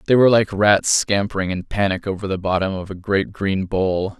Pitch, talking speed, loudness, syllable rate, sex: 100 Hz, 215 wpm, -19 LUFS, 5.2 syllables/s, male